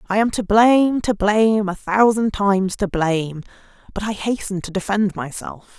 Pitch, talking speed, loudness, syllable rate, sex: 205 Hz, 175 wpm, -19 LUFS, 4.9 syllables/s, female